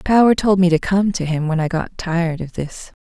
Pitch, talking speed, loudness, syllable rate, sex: 175 Hz, 255 wpm, -18 LUFS, 5.3 syllables/s, female